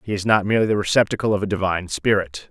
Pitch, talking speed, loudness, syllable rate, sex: 100 Hz, 240 wpm, -20 LUFS, 7.5 syllables/s, male